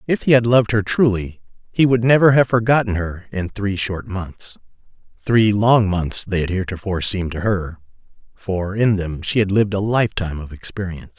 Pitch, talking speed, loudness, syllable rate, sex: 100 Hz, 180 wpm, -18 LUFS, 5.5 syllables/s, male